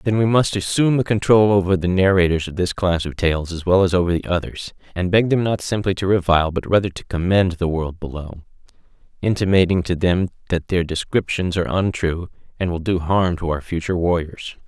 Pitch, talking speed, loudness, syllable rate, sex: 90 Hz, 205 wpm, -19 LUFS, 5.7 syllables/s, male